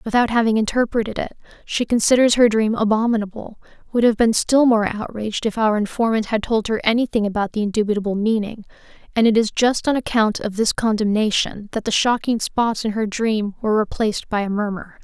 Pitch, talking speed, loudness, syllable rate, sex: 220 Hz, 190 wpm, -19 LUFS, 5.8 syllables/s, female